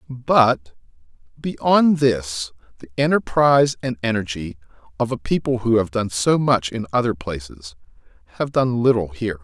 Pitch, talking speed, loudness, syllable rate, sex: 115 Hz, 140 wpm, -20 LUFS, 4.5 syllables/s, male